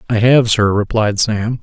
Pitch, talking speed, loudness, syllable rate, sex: 110 Hz, 185 wpm, -14 LUFS, 4.1 syllables/s, male